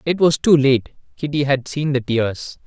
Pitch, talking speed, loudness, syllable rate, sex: 140 Hz, 205 wpm, -18 LUFS, 4.4 syllables/s, male